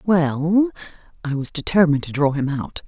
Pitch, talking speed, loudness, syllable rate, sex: 160 Hz, 165 wpm, -20 LUFS, 5.1 syllables/s, female